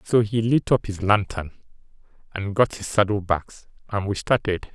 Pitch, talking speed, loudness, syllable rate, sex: 105 Hz, 175 wpm, -23 LUFS, 4.7 syllables/s, male